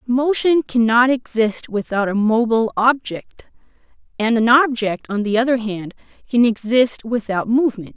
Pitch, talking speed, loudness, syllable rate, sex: 235 Hz, 135 wpm, -17 LUFS, 4.7 syllables/s, female